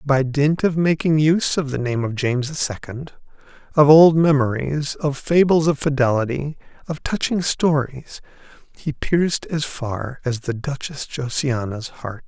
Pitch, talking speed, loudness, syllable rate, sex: 140 Hz, 150 wpm, -20 LUFS, 4.3 syllables/s, male